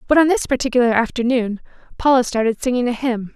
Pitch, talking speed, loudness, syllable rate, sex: 245 Hz, 180 wpm, -18 LUFS, 6.3 syllables/s, female